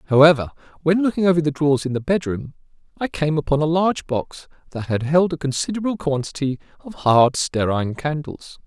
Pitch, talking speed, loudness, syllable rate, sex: 150 Hz, 175 wpm, -20 LUFS, 5.7 syllables/s, male